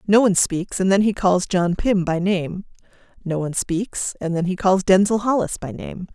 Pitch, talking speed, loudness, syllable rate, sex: 190 Hz, 215 wpm, -20 LUFS, 4.9 syllables/s, female